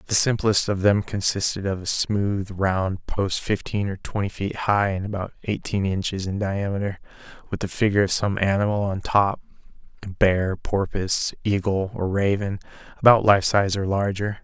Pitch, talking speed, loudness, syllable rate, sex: 100 Hz, 160 wpm, -23 LUFS, 4.8 syllables/s, male